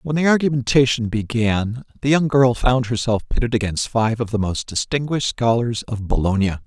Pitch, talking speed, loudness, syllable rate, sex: 120 Hz, 170 wpm, -19 LUFS, 5.2 syllables/s, male